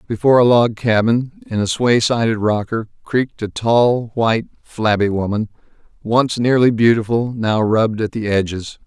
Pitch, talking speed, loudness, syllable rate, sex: 110 Hz, 155 wpm, -17 LUFS, 4.8 syllables/s, male